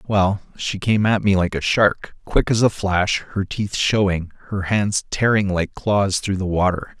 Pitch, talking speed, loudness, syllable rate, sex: 100 Hz, 195 wpm, -20 LUFS, 4.2 syllables/s, male